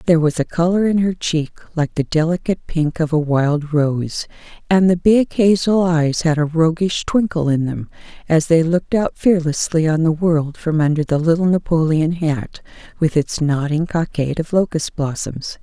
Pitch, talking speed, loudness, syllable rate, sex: 160 Hz, 180 wpm, -17 LUFS, 4.8 syllables/s, female